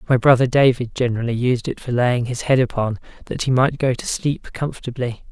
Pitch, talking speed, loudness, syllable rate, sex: 125 Hz, 205 wpm, -19 LUFS, 5.7 syllables/s, male